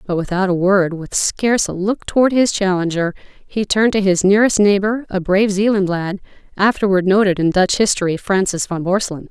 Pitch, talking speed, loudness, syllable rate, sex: 195 Hz, 180 wpm, -16 LUFS, 5.6 syllables/s, female